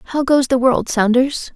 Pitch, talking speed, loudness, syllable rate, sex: 260 Hz, 195 wpm, -16 LUFS, 4.0 syllables/s, female